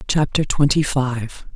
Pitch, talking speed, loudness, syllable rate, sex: 135 Hz, 115 wpm, -19 LUFS, 3.6 syllables/s, female